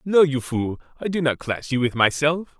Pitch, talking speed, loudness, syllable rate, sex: 145 Hz, 230 wpm, -22 LUFS, 4.9 syllables/s, male